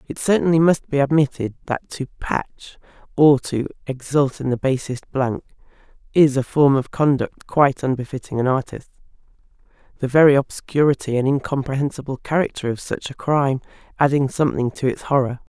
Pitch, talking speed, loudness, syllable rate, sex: 140 Hz, 150 wpm, -20 LUFS, 5.4 syllables/s, female